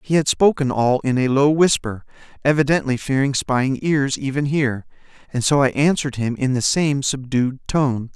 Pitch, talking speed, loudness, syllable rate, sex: 135 Hz, 175 wpm, -19 LUFS, 4.9 syllables/s, male